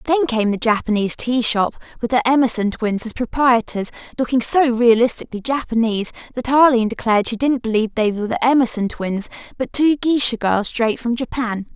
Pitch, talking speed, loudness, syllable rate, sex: 235 Hz, 175 wpm, -18 LUFS, 5.7 syllables/s, female